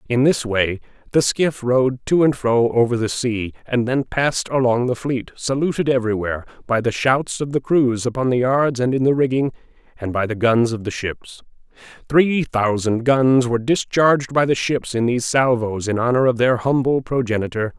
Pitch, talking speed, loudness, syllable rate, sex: 125 Hz, 195 wpm, -19 LUFS, 5.1 syllables/s, male